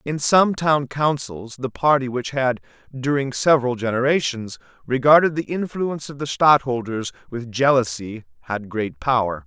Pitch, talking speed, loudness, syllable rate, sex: 130 Hz, 140 wpm, -20 LUFS, 4.7 syllables/s, male